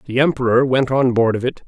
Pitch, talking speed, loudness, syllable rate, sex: 125 Hz, 250 wpm, -17 LUFS, 6.0 syllables/s, male